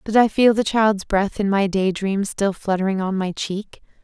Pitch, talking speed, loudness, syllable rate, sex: 200 Hz, 225 wpm, -20 LUFS, 4.6 syllables/s, female